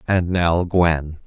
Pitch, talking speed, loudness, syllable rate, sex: 85 Hz, 145 wpm, -19 LUFS, 2.8 syllables/s, male